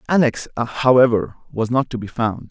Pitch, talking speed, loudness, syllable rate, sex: 120 Hz, 170 wpm, -19 LUFS, 5.4 syllables/s, male